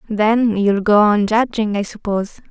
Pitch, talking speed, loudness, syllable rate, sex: 210 Hz, 170 wpm, -16 LUFS, 4.5 syllables/s, female